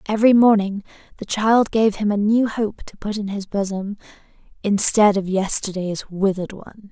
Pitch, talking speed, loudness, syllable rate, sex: 205 Hz, 165 wpm, -19 LUFS, 5.0 syllables/s, female